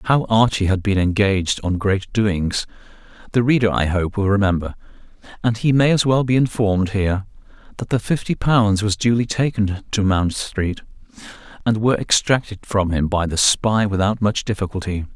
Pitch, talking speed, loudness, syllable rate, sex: 105 Hz, 170 wpm, -19 LUFS, 5.1 syllables/s, male